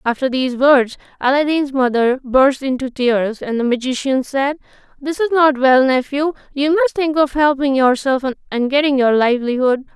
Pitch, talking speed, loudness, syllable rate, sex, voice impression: 270 Hz, 165 wpm, -16 LUFS, 5.0 syllables/s, female, feminine, adult-like, tensed, powerful, clear, slightly intellectual, slightly friendly, lively, slightly intense, sharp